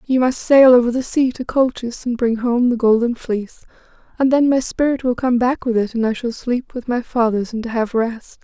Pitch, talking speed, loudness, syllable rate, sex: 240 Hz, 235 wpm, -18 LUFS, 5.0 syllables/s, female